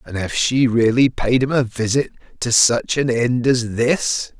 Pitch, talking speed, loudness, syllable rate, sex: 120 Hz, 190 wpm, -18 LUFS, 4.0 syllables/s, male